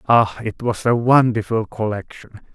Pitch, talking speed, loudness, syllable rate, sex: 115 Hz, 140 wpm, -19 LUFS, 4.5 syllables/s, male